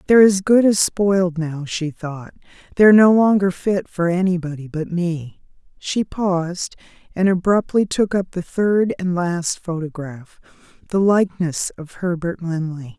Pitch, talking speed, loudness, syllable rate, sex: 180 Hz, 145 wpm, -19 LUFS, 4.3 syllables/s, female